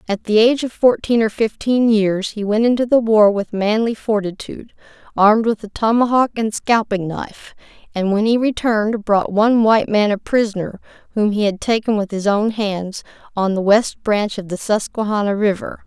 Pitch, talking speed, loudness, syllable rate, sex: 215 Hz, 185 wpm, -17 LUFS, 5.2 syllables/s, female